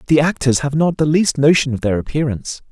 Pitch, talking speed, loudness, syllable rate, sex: 145 Hz, 220 wpm, -16 LUFS, 6.1 syllables/s, male